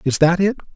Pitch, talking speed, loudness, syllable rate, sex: 180 Hz, 240 wpm, -17 LUFS, 6.1 syllables/s, male